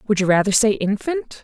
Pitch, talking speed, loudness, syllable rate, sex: 215 Hz, 210 wpm, -18 LUFS, 5.5 syllables/s, female